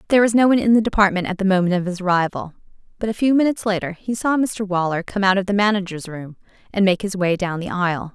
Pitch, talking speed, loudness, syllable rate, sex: 195 Hz, 260 wpm, -19 LUFS, 6.9 syllables/s, female